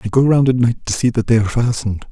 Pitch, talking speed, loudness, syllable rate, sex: 120 Hz, 315 wpm, -16 LUFS, 7.0 syllables/s, male